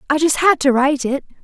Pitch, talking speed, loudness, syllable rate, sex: 285 Hz, 250 wpm, -16 LUFS, 6.5 syllables/s, female